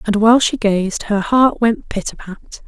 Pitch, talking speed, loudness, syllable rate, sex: 215 Hz, 180 wpm, -15 LUFS, 4.3 syllables/s, female